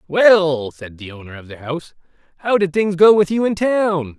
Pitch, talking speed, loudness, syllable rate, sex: 165 Hz, 215 wpm, -16 LUFS, 4.8 syllables/s, male